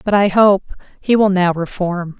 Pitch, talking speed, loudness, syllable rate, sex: 190 Hz, 190 wpm, -15 LUFS, 4.7 syllables/s, female